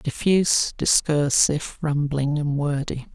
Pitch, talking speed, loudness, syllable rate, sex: 150 Hz, 95 wpm, -21 LUFS, 4.0 syllables/s, male